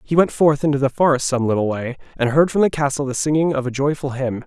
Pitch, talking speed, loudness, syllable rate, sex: 140 Hz, 270 wpm, -19 LUFS, 6.3 syllables/s, male